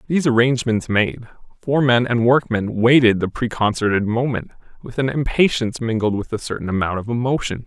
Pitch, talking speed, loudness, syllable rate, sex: 120 Hz, 155 wpm, -19 LUFS, 5.9 syllables/s, male